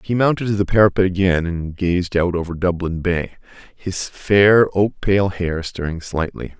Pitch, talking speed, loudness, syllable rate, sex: 90 Hz, 165 wpm, -18 LUFS, 4.6 syllables/s, male